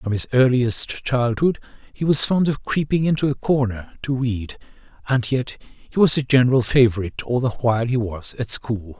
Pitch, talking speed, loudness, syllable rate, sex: 125 Hz, 185 wpm, -20 LUFS, 5.0 syllables/s, male